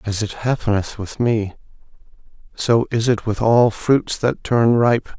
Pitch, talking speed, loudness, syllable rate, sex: 115 Hz, 160 wpm, -18 LUFS, 4.0 syllables/s, male